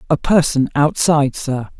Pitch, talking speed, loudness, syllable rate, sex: 145 Hz, 135 wpm, -16 LUFS, 4.7 syllables/s, female